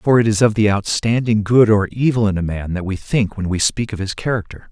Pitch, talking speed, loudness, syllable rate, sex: 105 Hz, 265 wpm, -17 LUFS, 5.6 syllables/s, male